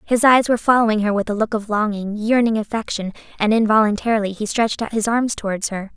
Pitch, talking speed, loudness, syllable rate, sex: 215 Hz, 210 wpm, -19 LUFS, 6.3 syllables/s, female